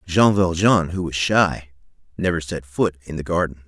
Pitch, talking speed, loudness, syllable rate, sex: 85 Hz, 180 wpm, -20 LUFS, 4.6 syllables/s, male